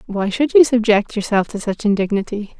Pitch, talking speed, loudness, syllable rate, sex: 215 Hz, 185 wpm, -17 LUFS, 5.4 syllables/s, female